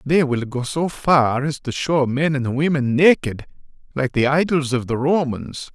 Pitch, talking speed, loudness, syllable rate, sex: 140 Hz, 190 wpm, -19 LUFS, 4.3 syllables/s, male